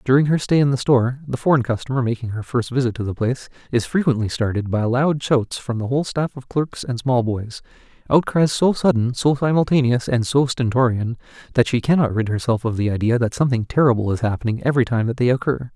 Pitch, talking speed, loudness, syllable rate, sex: 125 Hz, 215 wpm, -20 LUFS, 6.1 syllables/s, male